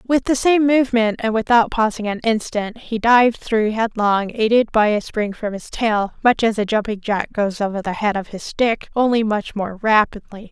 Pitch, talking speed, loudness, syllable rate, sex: 220 Hz, 205 wpm, -18 LUFS, 4.8 syllables/s, female